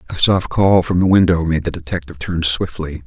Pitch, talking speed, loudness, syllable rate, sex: 85 Hz, 215 wpm, -16 LUFS, 5.6 syllables/s, male